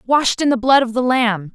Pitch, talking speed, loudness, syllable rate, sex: 245 Hz, 275 wpm, -16 LUFS, 4.6 syllables/s, female